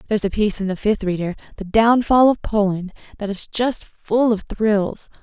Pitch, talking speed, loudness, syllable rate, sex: 210 Hz, 185 wpm, -19 LUFS, 5.2 syllables/s, female